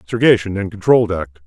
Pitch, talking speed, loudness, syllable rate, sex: 100 Hz, 165 wpm, -16 LUFS, 5.8 syllables/s, male